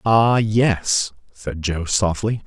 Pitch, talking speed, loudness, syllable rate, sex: 100 Hz, 120 wpm, -19 LUFS, 2.8 syllables/s, male